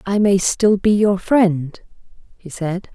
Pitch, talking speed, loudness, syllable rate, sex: 190 Hz, 165 wpm, -17 LUFS, 3.5 syllables/s, female